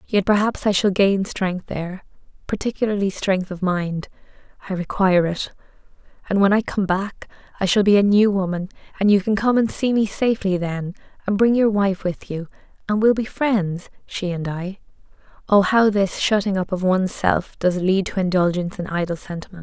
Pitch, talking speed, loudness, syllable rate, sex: 195 Hz, 180 wpm, -20 LUFS, 5.2 syllables/s, female